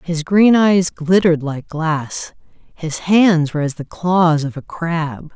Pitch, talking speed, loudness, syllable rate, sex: 165 Hz, 170 wpm, -16 LUFS, 3.6 syllables/s, female